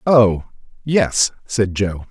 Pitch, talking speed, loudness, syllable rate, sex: 110 Hz, 115 wpm, -18 LUFS, 2.7 syllables/s, male